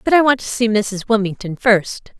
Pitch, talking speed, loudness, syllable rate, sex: 220 Hz, 220 wpm, -17 LUFS, 5.0 syllables/s, female